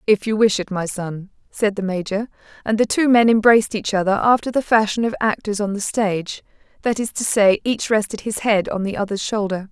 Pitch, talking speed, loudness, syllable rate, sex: 210 Hz, 220 wpm, -19 LUFS, 5.5 syllables/s, female